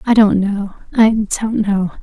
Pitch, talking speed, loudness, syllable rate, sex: 205 Hz, 180 wpm, -15 LUFS, 3.9 syllables/s, female